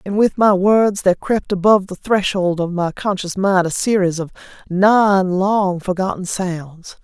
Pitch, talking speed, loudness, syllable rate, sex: 190 Hz, 170 wpm, -17 LUFS, 4.3 syllables/s, female